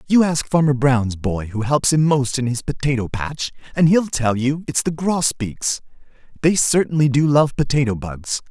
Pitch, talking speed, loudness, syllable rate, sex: 135 Hz, 185 wpm, -19 LUFS, 4.6 syllables/s, male